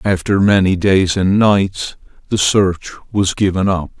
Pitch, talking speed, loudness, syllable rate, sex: 95 Hz, 150 wpm, -15 LUFS, 3.7 syllables/s, male